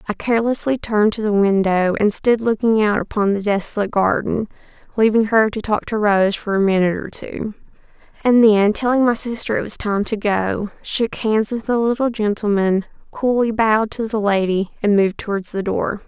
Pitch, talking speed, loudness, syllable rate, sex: 210 Hz, 190 wpm, -18 LUFS, 5.2 syllables/s, female